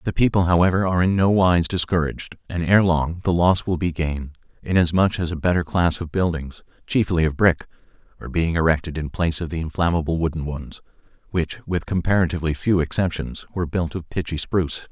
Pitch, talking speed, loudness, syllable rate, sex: 85 Hz, 185 wpm, -21 LUFS, 5.8 syllables/s, male